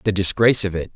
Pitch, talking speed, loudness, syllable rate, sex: 100 Hz, 250 wpm, -17 LUFS, 7.3 syllables/s, male